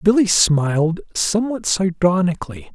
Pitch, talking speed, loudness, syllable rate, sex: 180 Hz, 85 wpm, -18 LUFS, 4.8 syllables/s, male